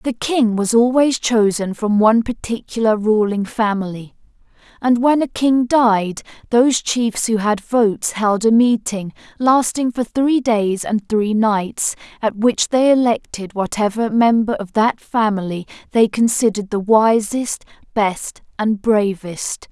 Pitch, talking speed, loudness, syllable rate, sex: 225 Hz, 140 wpm, -17 LUFS, 4.1 syllables/s, female